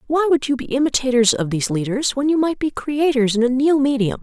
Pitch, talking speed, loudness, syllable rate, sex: 265 Hz, 240 wpm, -18 LUFS, 5.9 syllables/s, female